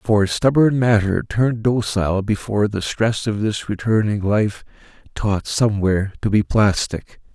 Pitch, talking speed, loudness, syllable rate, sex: 105 Hz, 140 wpm, -19 LUFS, 4.5 syllables/s, male